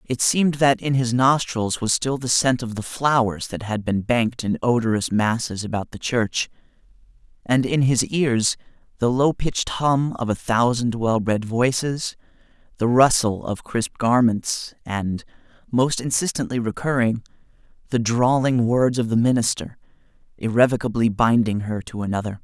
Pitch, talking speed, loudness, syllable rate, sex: 120 Hz, 150 wpm, -21 LUFS, 4.6 syllables/s, male